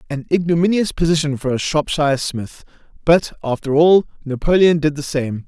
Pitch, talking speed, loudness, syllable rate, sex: 155 Hz, 165 wpm, -17 LUFS, 5.4 syllables/s, male